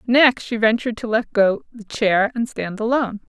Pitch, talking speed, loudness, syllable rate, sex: 225 Hz, 195 wpm, -19 LUFS, 4.9 syllables/s, female